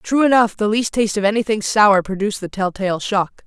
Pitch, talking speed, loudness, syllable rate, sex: 210 Hz, 225 wpm, -17 LUFS, 5.5 syllables/s, female